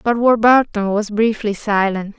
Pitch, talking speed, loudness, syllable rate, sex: 215 Hz, 135 wpm, -16 LUFS, 4.4 syllables/s, female